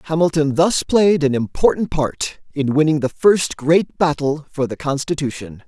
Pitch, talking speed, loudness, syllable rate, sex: 150 Hz, 160 wpm, -18 LUFS, 4.6 syllables/s, male